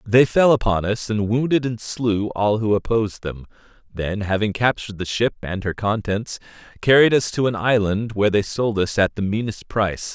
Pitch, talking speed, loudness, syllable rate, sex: 110 Hz, 195 wpm, -20 LUFS, 5.1 syllables/s, male